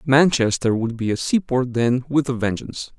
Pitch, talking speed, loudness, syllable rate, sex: 125 Hz, 180 wpm, -20 LUFS, 5.0 syllables/s, male